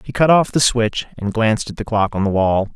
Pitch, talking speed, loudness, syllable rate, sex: 115 Hz, 285 wpm, -17 LUFS, 5.6 syllables/s, male